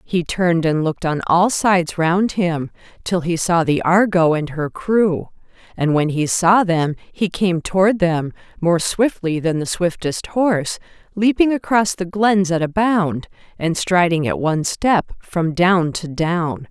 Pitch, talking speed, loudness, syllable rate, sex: 175 Hz, 170 wpm, -18 LUFS, 4.1 syllables/s, female